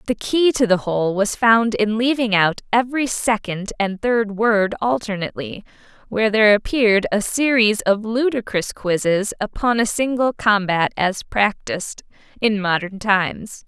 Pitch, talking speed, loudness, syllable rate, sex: 215 Hz, 145 wpm, -19 LUFS, 4.6 syllables/s, female